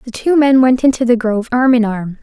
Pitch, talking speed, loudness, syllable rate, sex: 240 Hz, 270 wpm, -13 LUFS, 5.8 syllables/s, female